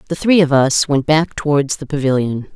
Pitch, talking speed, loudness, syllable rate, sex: 145 Hz, 210 wpm, -15 LUFS, 5.1 syllables/s, female